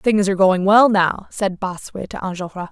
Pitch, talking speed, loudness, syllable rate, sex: 195 Hz, 200 wpm, -18 LUFS, 4.9 syllables/s, female